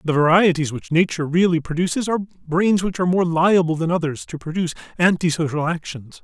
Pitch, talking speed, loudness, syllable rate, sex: 170 Hz, 175 wpm, -20 LUFS, 6.3 syllables/s, male